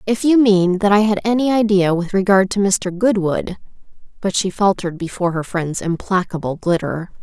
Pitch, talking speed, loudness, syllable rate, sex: 190 Hz, 175 wpm, -17 LUFS, 5.2 syllables/s, female